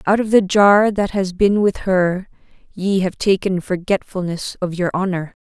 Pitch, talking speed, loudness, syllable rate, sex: 190 Hz, 175 wpm, -18 LUFS, 4.4 syllables/s, female